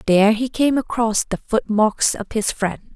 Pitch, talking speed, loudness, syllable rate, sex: 215 Hz, 180 wpm, -19 LUFS, 4.4 syllables/s, female